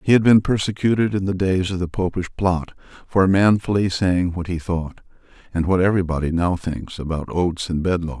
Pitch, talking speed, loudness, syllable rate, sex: 90 Hz, 200 wpm, -20 LUFS, 5.4 syllables/s, male